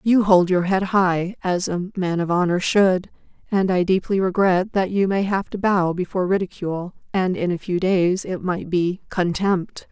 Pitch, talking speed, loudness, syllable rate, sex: 185 Hz, 195 wpm, -21 LUFS, 4.5 syllables/s, female